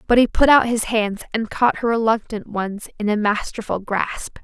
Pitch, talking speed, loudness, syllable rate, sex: 220 Hz, 205 wpm, -20 LUFS, 4.7 syllables/s, female